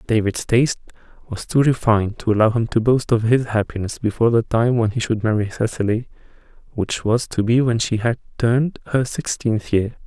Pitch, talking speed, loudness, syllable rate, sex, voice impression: 115 Hz, 190 wpm, -19 LUFS, 5.5 syllables/s, male, masculine, adult-like, slightly relaxed, slightly weak, soft, cool, intellectual, calm, friendly, slightly wild, kind, slightly modest